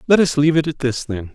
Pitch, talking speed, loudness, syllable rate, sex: 140 Hz, 315 wpm, -18 LUFS, 6.7 syllables/s, male